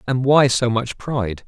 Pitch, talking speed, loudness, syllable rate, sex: 125 Hz, 205 wpm, -18 LUFS, 4.5 syllables/s, male